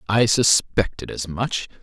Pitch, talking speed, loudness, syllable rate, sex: 105 Hz, 130 wpm, -20 LUFS, 3.9 syllables/s, male